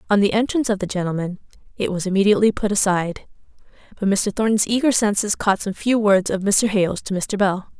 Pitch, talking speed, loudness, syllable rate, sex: 200 Hz, 200 wpm, -20 LUFS, 6.2 syllables/s, female